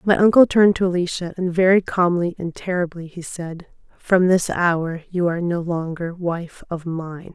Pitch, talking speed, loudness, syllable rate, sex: 175 Hz, 180 wpm, -20 LUFS, 4.7 syllables/s, female